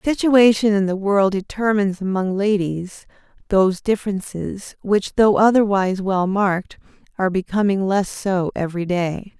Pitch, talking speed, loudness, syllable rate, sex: 195 Hz, 130 wpm, -19 LUFS, 4.8 syllables/s, female